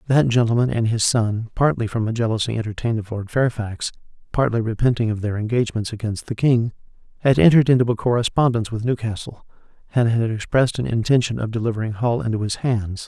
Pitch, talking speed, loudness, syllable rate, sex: 115 Hz, 180 wpm, -20 LUFS, 6.3 syllables/s, male